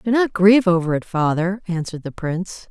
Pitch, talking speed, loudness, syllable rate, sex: 185 Hz, 200 wpm, -19 LUFS, 5.9 syllables/s, female